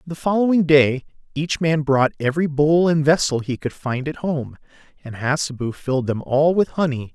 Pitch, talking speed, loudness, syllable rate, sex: 145 Hz, 185 wpm, -20 LUFS, 5.0 syllables/s, male